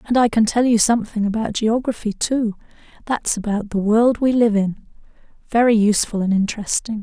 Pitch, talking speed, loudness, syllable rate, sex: 220 Hz, 155 wpm, -18 LUFS, 5.6 syllables/s, female